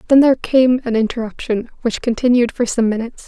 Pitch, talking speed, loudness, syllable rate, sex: 235 Hz, 185 wpm, -17 LUFS, 6.1 syllables/s, female